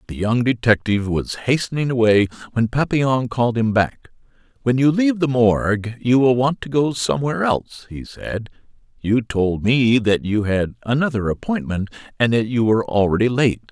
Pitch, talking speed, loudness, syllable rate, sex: 120 Hz, 170 wpm, -19 LUFS, 5.2 syllables/s, male